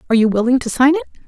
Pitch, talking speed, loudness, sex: 250 Hz, 285 wpm, -15 LUFS, female